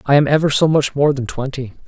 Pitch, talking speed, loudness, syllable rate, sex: 140 Hz, 255 wpm, -16 LUFS, 6.0 syllables/s, male